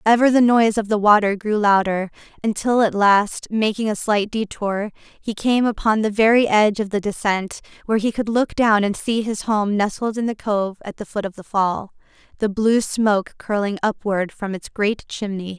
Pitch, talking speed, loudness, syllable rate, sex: 210 Hz, 200 wpm, -19 LUFS, 4.9 syllables/s, female